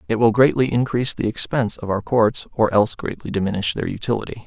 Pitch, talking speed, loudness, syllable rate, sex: 110 Hz, 200 wpm, -20 LUFS, 6.4 syllables/s, male